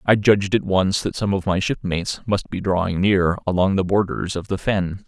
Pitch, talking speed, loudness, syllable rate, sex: 95 Hz, 225 wpm, -20 LUFS, 5.2 syllables/s, male